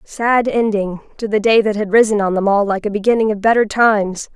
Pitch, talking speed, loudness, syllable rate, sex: 210 Hz, 235 wpm, -15 LUFS, 5.6 syllables/s, female